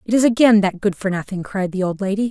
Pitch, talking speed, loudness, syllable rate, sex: 200 Hz, 285 wpm, -18 LUFS, 6.3 syllables/s, female